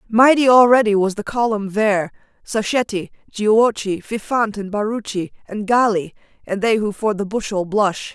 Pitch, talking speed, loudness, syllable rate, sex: 210 Hz, 145 wpm, -18 LUFS, 4.5 syllables/s, female